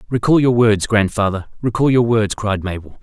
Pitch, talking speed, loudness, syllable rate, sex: 110 Hz, 160 wpm, -16 LUFS, 5.1 syllables/s, male